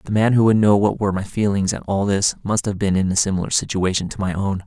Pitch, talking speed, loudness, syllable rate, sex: 100 Hz, 285 wpm, -19 LUFS, 6.3 syllables/s, male